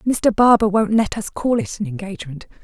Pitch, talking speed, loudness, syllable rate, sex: 225 Hz, 205 wpm, -18 LUFS, 5.3 syllables/s, female